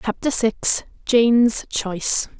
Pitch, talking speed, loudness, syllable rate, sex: 225 Hz, 100 wpm, -19 LUFS, 3.6 syllables/s, female